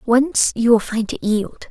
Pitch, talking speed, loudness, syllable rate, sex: 235 Hz, 210 wpm, -18 LUFS, 3.8 syllables/s, female